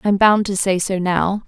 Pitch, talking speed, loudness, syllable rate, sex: 195 Hz, 285 wpm, -17 LUFS, 5.2 syllables/s, female